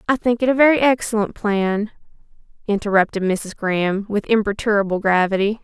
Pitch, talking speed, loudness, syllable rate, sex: 210 Hz, 140 wpm, -19 LUFS, 5.6 syllables/s, female